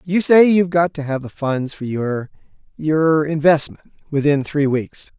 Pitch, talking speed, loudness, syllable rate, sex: 150 Hz, 160 wpm, -18 LUFS, 4.4 syllables/s, male